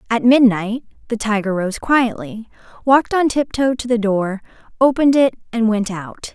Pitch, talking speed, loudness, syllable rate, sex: 230 Hz, 170 wpm, -17 LUFS, 4.8 syllables/s, female